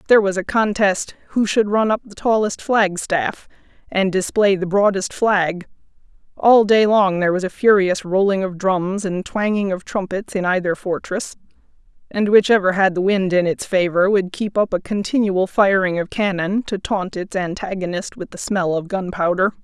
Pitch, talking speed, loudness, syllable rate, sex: 195 Hz, 180 wpm, -18 LUFS, 4.8 syllables/s, female